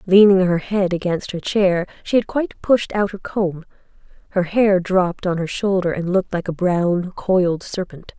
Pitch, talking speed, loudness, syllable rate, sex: 185 Hz, 190 wpm, -19 LUFS, 4.7 syllables/s, female